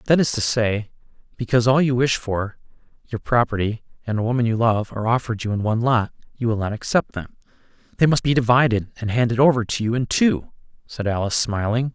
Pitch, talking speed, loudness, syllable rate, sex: 115 Hz, 205 wpm, -20 LUFS, 6.1 syllables/s, male